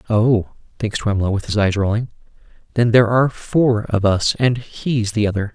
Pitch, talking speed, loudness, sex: 110 Hz, 185 wpm, -18 LUFS, male